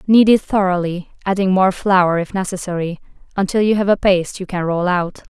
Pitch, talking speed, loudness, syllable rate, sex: 185 Hz, 190 wpm, -17 LUFS, 5.5 syllables/s, female